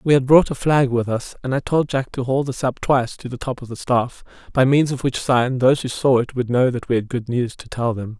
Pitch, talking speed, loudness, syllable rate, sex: 125 Hz, 300 wpm, -20 LUFS, 5.5 syllables/s, male